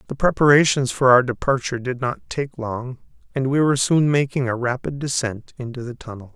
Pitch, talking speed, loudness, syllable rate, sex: 130 Hz, 190 wpm, -20 LUFS, 5.6 syllables/s, male